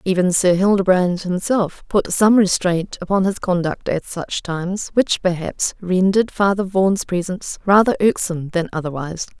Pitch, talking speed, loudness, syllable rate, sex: 185 Hz, 145 wpm, -18 LUFS, 5.0 syllables/s, female